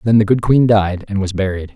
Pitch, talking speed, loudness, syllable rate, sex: 105 Hz, 275 wpm, -15 LUFS, 5.8 syllables/s, male